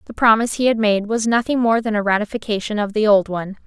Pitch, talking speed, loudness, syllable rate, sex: 215 Hz, 245 wpm, -18 LUFS, 6.7 syllables/s, female